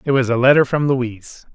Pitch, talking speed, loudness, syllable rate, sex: 130 Hz, 235 wpm, -16 LUFS, 5.8 syllables/s, male